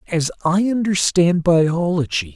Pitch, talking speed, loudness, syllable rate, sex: 170 Hz, 100 wpm, -18 LUFS, 3.9 syllables/s, male